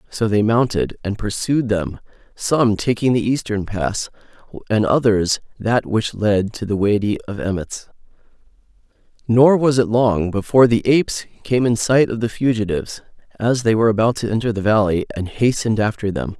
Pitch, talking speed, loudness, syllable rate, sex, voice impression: 110 Hz, 170 wpm, -18 LUFS, 5.0 syllables/s, male, masculine, adult-like, slightly thick, cool, sincere, friendly, slightly kind